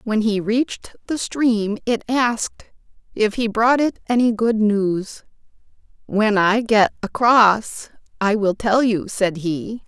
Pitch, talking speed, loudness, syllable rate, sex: 220 Hz, 145 wpm, -19 LUFS, 3.6 syllables/s, female